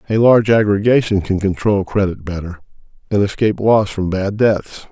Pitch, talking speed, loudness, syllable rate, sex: 100 Hz, 160 wpm, -16 LUFS, 5.3 syllables/s, male